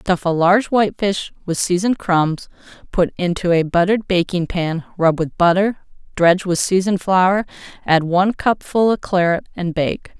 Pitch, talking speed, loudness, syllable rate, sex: 185 Hz, 160 wpm, -17 LUFS, 5.0 syllables/s, female